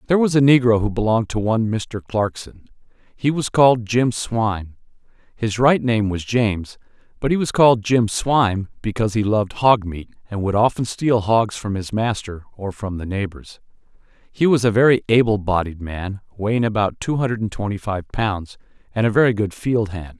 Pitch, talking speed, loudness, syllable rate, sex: 110 Hz, 190 wpm, -19 LUFS, 5.3 syllables/s, male